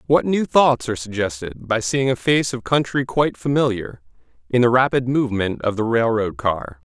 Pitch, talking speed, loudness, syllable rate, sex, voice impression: 120 Hz, 190 wpm, -20 LUFS, 5.2 syllables/s, male, masculine, adult-like, thick, tensed, powerful, slightly bright, clear, raspy, cool, intellectual, calm, slightly mature, wild, lively